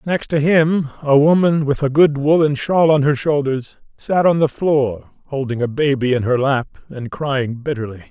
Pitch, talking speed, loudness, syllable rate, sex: 140 Hz, 190 wpm, -17 LUFS, 4.6 syllables/s, male